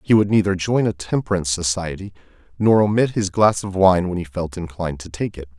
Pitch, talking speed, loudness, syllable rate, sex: 95 Hz, 215 wpm, -20 LUFS, 5.8 syllables/s, male